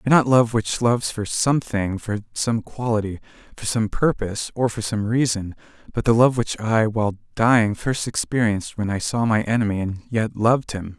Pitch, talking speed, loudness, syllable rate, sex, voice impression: 110 Hz, 180 wpm, -21 LUFS, 5.3 syllables/s, male, masculine, very adult-like, slightly halting, calm, slightly reassuring, slightly modest